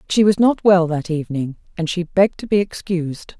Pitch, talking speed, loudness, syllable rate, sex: 180 Hz, 210 wpm, -18 LUFS, 5.7 syllables/s, female